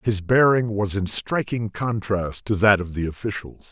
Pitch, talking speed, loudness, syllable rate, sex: 105 Hz, 180 wpm, -22 LUFS, 4.4 syllables/s, male